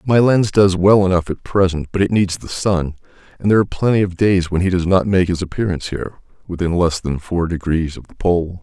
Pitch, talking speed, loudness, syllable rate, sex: 90 Hz, 235 wpm, -17 LUFS, 5.8 syllables/s, male